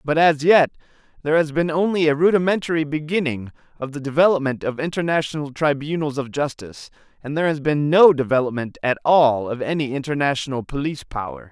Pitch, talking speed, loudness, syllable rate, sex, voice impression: 150 Hz, 160 wpm, -20 LUFS, 6.1 syllables/s, male, very masculine, slightly young, very adult-like, slightly thick, tensed, slightly powerful, very bright, slightly hard, clear, very fluent, slightly raspy, slightly cool, slightly intellectual, very refreshing, sincere, slightly calm, very friendly, reassuring, very unique, slightly elegant, wild, very lively, slightly kind, intense, light